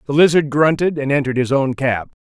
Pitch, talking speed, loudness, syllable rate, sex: 140 Hz, 215 wpm, -16 LUFS, 6.1 syllables/s, male